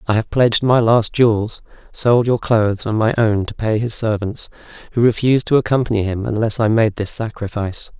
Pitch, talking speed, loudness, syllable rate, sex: 110 Hz, 195 wpm, -17 LUFS, 5.6 syllables/s, male